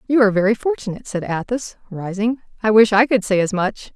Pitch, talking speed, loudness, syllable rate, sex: 215 Hz, 215 wpm, -18 LUFS, 6.1 syllables/s, female